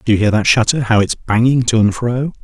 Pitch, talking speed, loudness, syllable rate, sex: 115 Hz, 270 wpm, -14 LUFS, 5.7 syllables/s, male